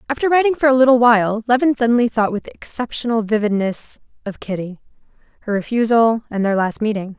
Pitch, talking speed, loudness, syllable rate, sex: 230 Hz, 165 wpm, -17 LUFS, 6.0 syllables/s, female